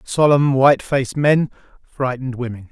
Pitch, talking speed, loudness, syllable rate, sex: 135 Hz, 135 wpm, -17 LUFS, 5.2 syllables/s, male